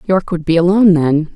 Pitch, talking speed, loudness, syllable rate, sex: 170 Hz, 220 wpm, -13 LUFS, 6.4 syllables/s, female